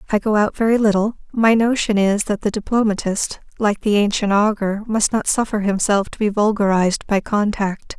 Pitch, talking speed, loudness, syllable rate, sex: 210 Hz, 180 wpm, -18 LUFS, 5.1 syllables/s, female